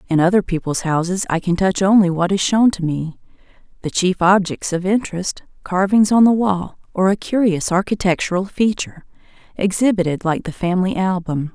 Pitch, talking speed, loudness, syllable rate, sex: 185 Hz, 160 wpm, -18 LUFS, 5.4 syllables/s, female